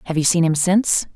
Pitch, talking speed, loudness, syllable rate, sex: 170 Hz, 260 wpm, -17 LUFS, 6.6 syllables/s, female